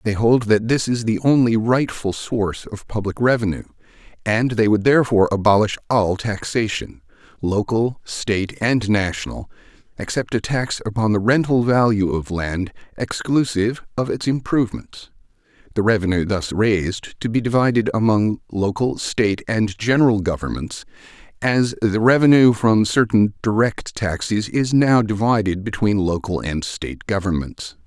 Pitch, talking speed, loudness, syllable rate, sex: 110 Hz, 135 wpm, -19 LUFS, 4.7 syllables/s, male